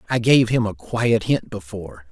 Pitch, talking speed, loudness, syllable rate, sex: 110 Hz, 200 wpm, -19 LUFS, 4.8 syllables/s, male